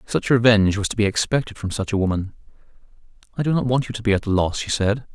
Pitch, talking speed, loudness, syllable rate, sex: 110 Hz, 255 wpm, -21 LUFS, 6.8 syllables/s, male